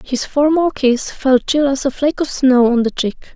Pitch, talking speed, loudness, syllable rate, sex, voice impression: 270 Hz, 230 wpm, -15 LUFS, 4.9 syllables/s, female, gender-neutral, slightly adult-like, soft, slightly fluent, friendly, slightly unique, kind